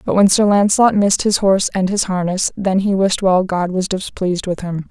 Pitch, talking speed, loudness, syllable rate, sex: 190 Hz, 230 wpm, -16 LUFS, 5.5 syllables/s, female